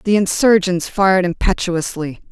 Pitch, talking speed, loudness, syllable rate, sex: 185 Hz, 105 wpm, -16 LUFS, 4.7 syllables/s, female